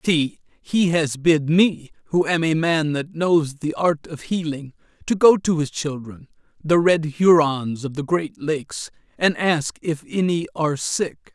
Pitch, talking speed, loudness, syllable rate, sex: 160 Hz, 175 wpm, -21 LUFS, 4.0 syllables/s, male